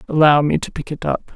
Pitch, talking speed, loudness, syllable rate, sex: 150 Hz, 265 wpm, -18 LUFS, 5.9 syllables/s, female